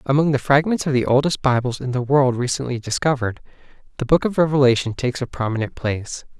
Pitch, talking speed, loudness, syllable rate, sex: 130 Hz, 190 wpm, -20 LUFS, 6.4 syllables/s, male